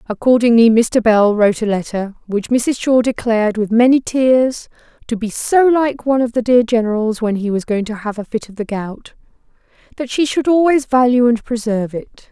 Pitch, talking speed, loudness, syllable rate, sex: 230 Hz, 200 wpm, -15 LUFS, 5.2 syllables/s, female